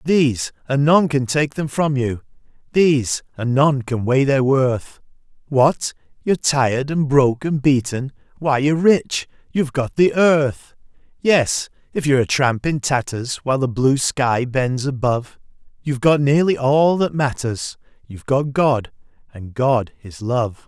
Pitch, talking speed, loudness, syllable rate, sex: 135 Hz, 155 wpm, -18 LUFS, 4.4 syllables/s, male